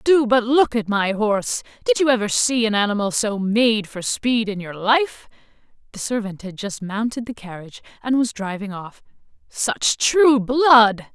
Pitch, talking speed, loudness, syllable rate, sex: 225 Hz, 180 wpm, -19 LUFS, 3.8 syllables/s, female